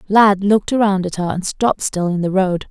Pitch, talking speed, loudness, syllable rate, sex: 195 Hz, 245 wpm, -17 LUFS, 5.5 syllables/s, female